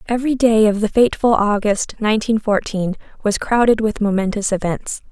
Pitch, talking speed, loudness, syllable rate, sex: 215 Hz, 150 wpm, -17 LUFS, 5.4 syllables/s, female